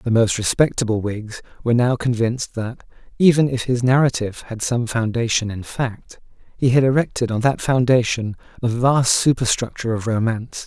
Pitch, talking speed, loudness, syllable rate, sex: 120 Hz, 160 wpm, -19 LUFS, 5.3 syllables/s, male